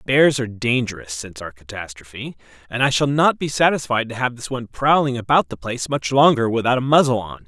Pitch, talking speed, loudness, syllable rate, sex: 120 Hz, 195 wpm, -19 LUFS, 6.0 syllables/s, male